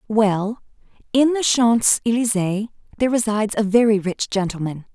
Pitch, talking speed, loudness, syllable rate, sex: 215 Hz, 135 wpm, -19 LUFS, 5.0 syllables/s, female